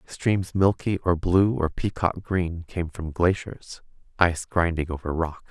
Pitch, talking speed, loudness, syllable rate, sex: 85 Hz, 140 wpm, -25 LUFS, 4.0 syllables/s, male